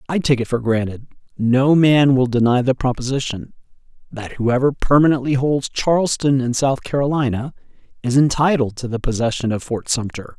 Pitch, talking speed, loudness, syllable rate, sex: 130 Hz, 155 wpm, -18 LUFS, 5.2 syllables/s, male